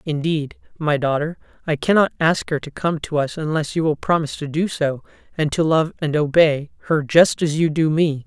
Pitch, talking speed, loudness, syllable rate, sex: 155 Hz, 210 wpm, -20 LUFS, 5.1 syllables/s, female